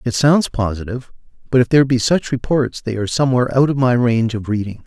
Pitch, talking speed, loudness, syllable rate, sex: 125 Hz, 220 wpm, -17 LUFS, 6.6 syllables/s, male